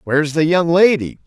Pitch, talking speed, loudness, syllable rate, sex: 160 Hz, 190 wpm, -15 LUFS, 5.4 syllables/s, male